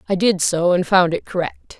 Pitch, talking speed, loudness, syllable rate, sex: 180 Hz, 235 wpm, -18 LUFS, 5.0 syllables/s, female